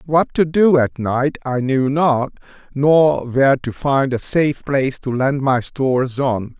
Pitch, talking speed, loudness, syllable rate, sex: 135 Hz, 180 wpm, -17 LUFS, 4.1 syllables/s, male